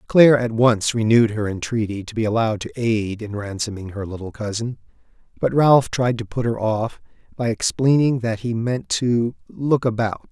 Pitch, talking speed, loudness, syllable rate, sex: 115 Hz, 180 wpm, -20 LUFS, 5.0 syllables/s, male